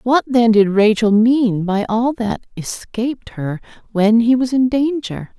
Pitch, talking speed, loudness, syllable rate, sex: 230 Hz, 165 wpm, -16 LUFS, 4.0 syllables/s, female